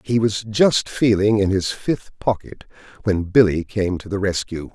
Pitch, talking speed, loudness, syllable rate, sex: 100 Hz, 175 wpm, -20 LUFS, 4.3 syllables/s, male